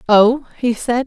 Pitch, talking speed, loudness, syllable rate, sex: 240 Hz, 170 wpm, -16 LUFS, 3.5 syllables/s, female